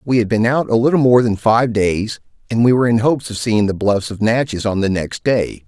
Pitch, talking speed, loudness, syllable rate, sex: 115 Hz, 265 wpm, -16 LUFS, 5.5 syllables/s, male